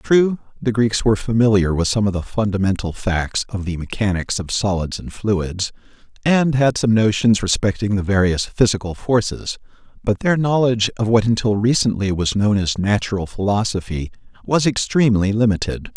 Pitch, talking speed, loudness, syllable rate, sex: 105 Hz, 160 wpm, -19 LUFS, 5.1 syllables/s, male